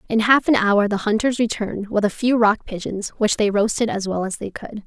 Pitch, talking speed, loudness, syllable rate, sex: 215 Hz, 245 wpm, -20 LUFS, 5.5 syllables/s, female